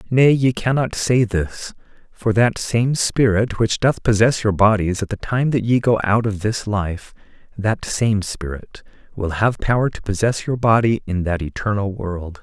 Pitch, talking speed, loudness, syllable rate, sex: 110 Hz, 185 wpm, -19 LUFS, 4.4 syllables/s, male